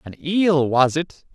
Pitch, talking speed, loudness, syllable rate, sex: 155 Hz, 180 wpm, -19 LUFS, 3.4 syllables/s, male